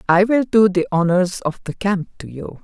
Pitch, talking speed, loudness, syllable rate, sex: 190 Hz, 230 wpm, -18 LUFS, 4.6 syllables/s, female